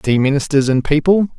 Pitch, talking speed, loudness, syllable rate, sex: 145 Hz, 175 wpm, -15 LUFS, 5.5 syllables/s, male